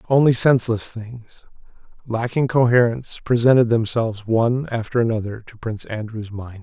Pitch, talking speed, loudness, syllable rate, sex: 115 Hz, 125 wpm, -19 LUFS, 5.3 syllables/s, male